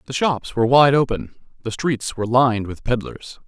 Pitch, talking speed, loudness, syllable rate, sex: 125 Hz, 190 wpm, -19 LUFS, 5.4 syllables/s, male